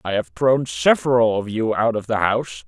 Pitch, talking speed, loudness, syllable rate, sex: 115 Hz, 225 wpm, -19 LUFS, 5.1 syllables/s, male